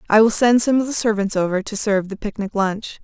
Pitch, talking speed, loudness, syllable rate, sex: 210 Hz, 255 wpm, -19 LUFS, 6.0 syllables/s, female